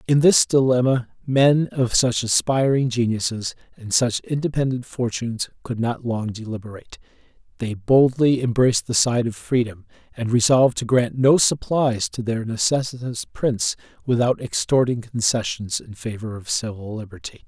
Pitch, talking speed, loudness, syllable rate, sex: 120 Hz, 140 wpm, -21 LUFS, 4.9 syllables/s, male